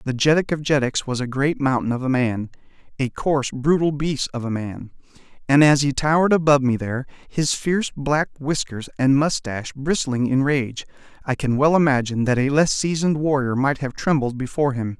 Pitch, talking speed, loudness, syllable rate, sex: 140 Hz, 185 wpm, -21 LUFS, 5.6 syllables/s, male